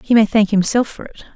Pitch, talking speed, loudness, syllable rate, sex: 210 Hz, 265 wpm, -16 LUFS, 6.0 syllables/s, female